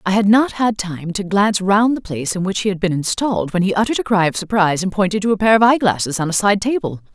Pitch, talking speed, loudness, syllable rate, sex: 195 Hz, 295 wpm, -17 LUFS, 6.6 syllables/s, female